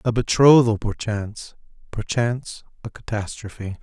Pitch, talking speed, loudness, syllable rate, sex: 110 Hz, 95 wpm, -20 LUFS, 4.8 syllables/s, male